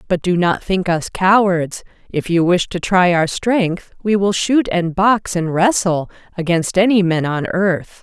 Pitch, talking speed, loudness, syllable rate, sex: 180 Hz, 185 wpm, -16 LUFS, 4.0 syllables/s, female